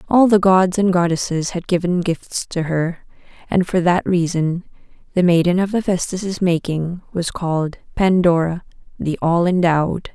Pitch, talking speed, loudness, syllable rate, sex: 175 Hz, 150 wpm, -18 LUFS, 4.6 syllables/s, female